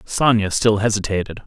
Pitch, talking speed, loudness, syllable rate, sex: 105 Hz, 125 wpm, -18 LUFS, 5.3 syllables/s, male